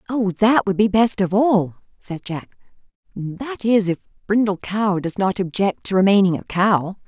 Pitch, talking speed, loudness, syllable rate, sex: 200 Hz, 180 wpm, -19 LUFS, 4.3 syllables/s, female